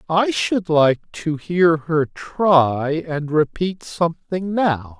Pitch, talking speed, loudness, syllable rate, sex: 165 Hz, 130 wpm, -19 LUFS, 2.9 syllables/s, male